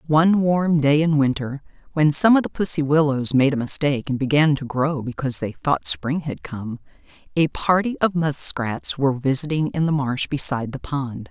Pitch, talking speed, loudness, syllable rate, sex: 145 Hz, 190 wpm, -20 LUFS, 5.1 syllables/s, female